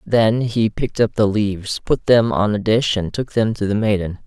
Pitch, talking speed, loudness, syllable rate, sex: 110 Hz, 240 wpm, -18 LUFS, 4.9 syllables/s, male